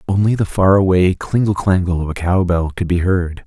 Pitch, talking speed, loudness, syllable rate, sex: 90 Hz, 225 wpm, -16 LUFS, 5.2 syllables/s, male